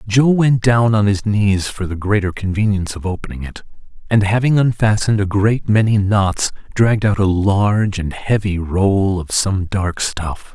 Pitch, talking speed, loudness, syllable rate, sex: 100 Hz, 175 wpm, -16 LUFS, 4.6 syllables/s, male